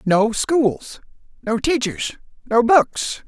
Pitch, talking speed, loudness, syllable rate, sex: 235 Hz, 110 wpm, -19 LUFS, 2.9 syllables/s, male